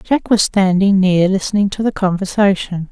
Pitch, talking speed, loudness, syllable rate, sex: 195 Hz, 165 wpm, -15 LUFS, 4.9 syllables/s, female